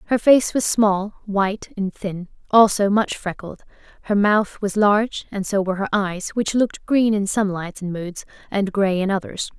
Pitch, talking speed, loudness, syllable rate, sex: 200 Hz, 195 wpm, -20 LUFS, 4.7 syllables/s, female